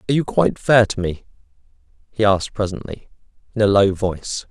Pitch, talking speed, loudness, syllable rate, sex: 105 Hz, 175 wpm, -18 LUFS, 6.3 syllables/s, male